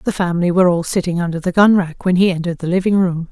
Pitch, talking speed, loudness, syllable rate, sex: 180 Hz, 255 wpm, -16 LUFS, 7.4 syllables/s, female